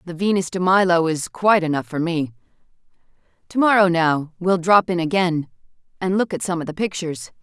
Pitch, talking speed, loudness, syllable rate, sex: 175 Hz, 185 wpm, -20 LUFS, 5.6 syllables/s, female